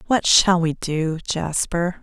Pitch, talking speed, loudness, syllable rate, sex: 170 Hz, 150 wpm, -19 LUFS, 3.3 syllables/s, female